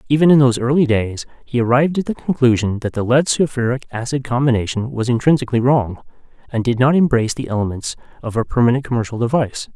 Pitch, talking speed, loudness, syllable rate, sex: 125 Hz, 185 wpm, -17 LUFS, 6.6 syllables/s, male